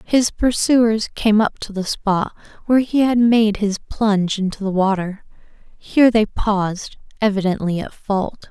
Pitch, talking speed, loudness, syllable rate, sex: 210 Hz, 155 wpm, -18 LUFS, 4.4 syllables/s, female